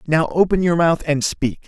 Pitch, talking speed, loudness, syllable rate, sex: 160 Hz, 215 wpm, -18 LUFS, 4.8 syllables/s, male